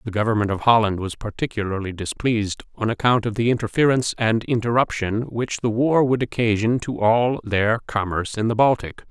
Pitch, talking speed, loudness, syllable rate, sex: 110 Hz, 170 wpm, -21 LUFS, 5.5 syllables/s, male